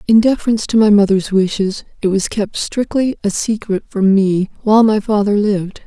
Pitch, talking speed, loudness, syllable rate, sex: 205 Hz, 185 wpm, -15 LUFS, 5.3 syllables/s, female